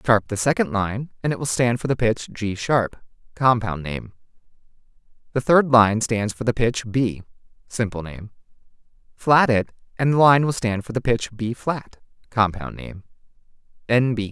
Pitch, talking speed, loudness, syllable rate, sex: 115 Hz, 170 wpm, -21 LUFS, 4.6 syllables/s, male